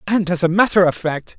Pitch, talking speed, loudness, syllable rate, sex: 180 Hz, 260 wpm, -17 LUFS, 5.6 syllables/s, male